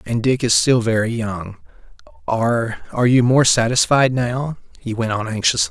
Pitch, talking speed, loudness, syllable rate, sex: 115 Hz, 160 wpm, -18 LUFS, 5.0 syllables/s, male